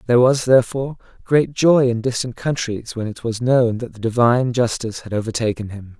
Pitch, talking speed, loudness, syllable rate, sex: 120 Hz, 190 wpm, -19 LUFS, 5.8 syllables/s, male